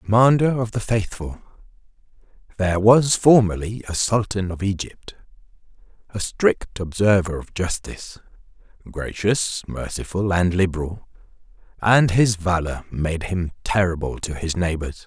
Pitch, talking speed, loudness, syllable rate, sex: 100 Hz, 115 wpm, -21 LUFS, 4.4 syllables/s, male